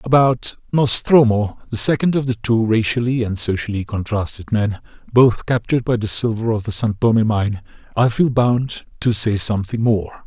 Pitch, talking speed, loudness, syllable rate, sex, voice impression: 115 Hz, 170 wpm, -18 LUFS, 4.8 syllables/s, male, masculine, very adult-like, slightly fluent, sincere, friendly, slightly reassuring